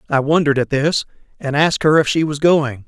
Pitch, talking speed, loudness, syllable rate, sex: 150 Hz, 230 wpm, -16 LUFS, 6.0 syllables/s, male